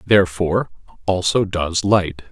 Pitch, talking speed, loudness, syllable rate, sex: 90 Hz, 105 wpm, -19 LUFS, 4.6 syllables/s, male